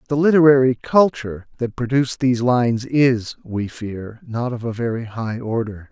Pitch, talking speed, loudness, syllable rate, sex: 120 Hz, 160 wpm, -19 LUFS, 5.0 syllables/s, male